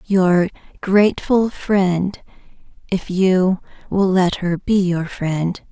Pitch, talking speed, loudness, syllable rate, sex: 185 Hz, 115 wpm, -18 LUFS, 1.8 syllables/s, female